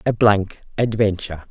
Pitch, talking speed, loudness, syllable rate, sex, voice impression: 105 Hz, 120 wpm, -20 LUFS, 5.1 syllables/s, female, masculine, adult-like, slightly soft, slightly calm, unique